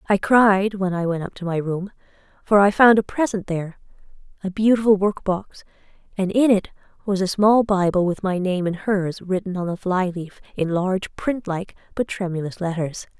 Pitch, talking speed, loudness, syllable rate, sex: 190 Hz, 185 wpm, -21 LUFS, 5.0 syllables/s, female